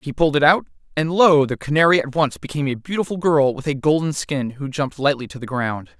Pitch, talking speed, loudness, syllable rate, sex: 145 Hz, 240 wpm, -19 LUFS, 6.1 syllables/s, male